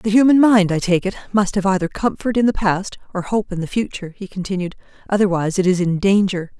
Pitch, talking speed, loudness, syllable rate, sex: 195 Hz, 225 wpm, -18 LUFS, 6.2 syllables/s, female